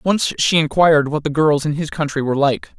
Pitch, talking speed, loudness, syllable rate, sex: 150 Hz, 235 wpm, -17 LUFS, 5.8 syllables/s, male